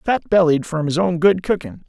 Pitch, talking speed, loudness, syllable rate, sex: 170 Hz, 225 wpm, -18 LUFS, 5.1 syllables/s, male